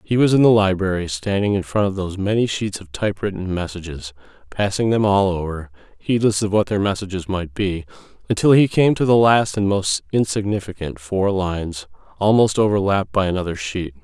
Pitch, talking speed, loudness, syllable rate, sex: 95 Hz, 180 wpm, -19 LUFS, 5.6 syllables/s, male